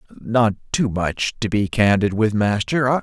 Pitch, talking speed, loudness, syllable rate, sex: 110 Hz, 160 wpm, -20 LUFS, 4.2 syllables/s, male